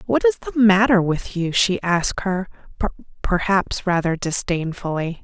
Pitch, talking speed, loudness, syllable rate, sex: 185 Hz, 140 wpm, -20 LUFS, 6.1 syllables/s, female